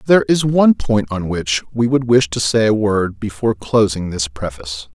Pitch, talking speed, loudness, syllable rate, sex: 105 Hz, 205 wpm, -16 LUFS, 5.1 syllables/s, male